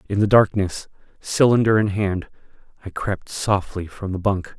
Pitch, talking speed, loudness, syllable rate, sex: 100 Hz, 155 wpm, -20 LUFS, 4.5 syllables/s, male